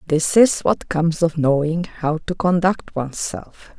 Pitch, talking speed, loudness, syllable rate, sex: 165 Hz, 160 wpm, -19 LUFS, 4.2 syllables/s, female